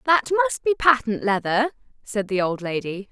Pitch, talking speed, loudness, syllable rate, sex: 230 Hz, 175 wpm, -22 LUFS, 5.7 syllables/s, female